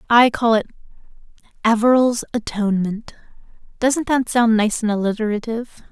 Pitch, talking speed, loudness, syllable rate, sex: 225 Hz, 110 wpm, -18 LUFS, 5.3 syllables/s, female